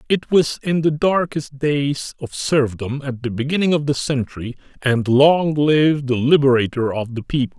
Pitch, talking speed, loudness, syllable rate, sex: 140 Hz, 175 wpm, -18 LUFS, 4.6 syllables/s, male